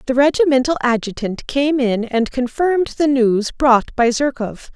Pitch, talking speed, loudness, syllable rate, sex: 260 Hz, 150 wpm, -17 LUFS, 4.4 syllables/s, female